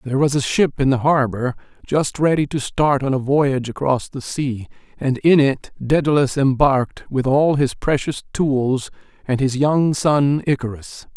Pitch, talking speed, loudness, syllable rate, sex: 135 Hz, 170 wpm, -19 LUFS, 4.5 syllables/s, male